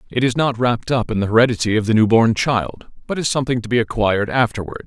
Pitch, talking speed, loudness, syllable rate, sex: 115 Hz, 245 wpm, -18 LUFS, 6.7 syllables/s, male